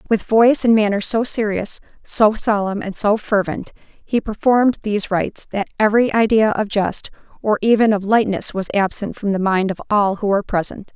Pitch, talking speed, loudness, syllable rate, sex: 210 Hz, 185 wpm, -18 LUFS, 5.2 syllables/s, female